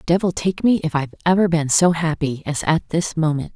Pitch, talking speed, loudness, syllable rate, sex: 165 Hz, 220 wpm, -19 LUFS, 5.5 syllables/s, female